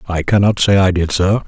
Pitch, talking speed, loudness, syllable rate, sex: 95 Hz, 245 wpm, -14 LUFS, 5.5 syllables/s, male